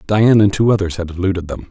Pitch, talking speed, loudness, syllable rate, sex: 100 Hz, 245 wpm, -15 LUFS, 6.4 syllables/s, male